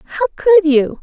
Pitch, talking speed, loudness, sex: 360 Hz, 175 wpm, -13 LUFS, female